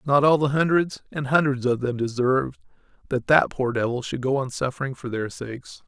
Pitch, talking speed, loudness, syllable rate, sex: 135 Hz, 205 wpm, -23 LUFS, 5.5 syllables/s, male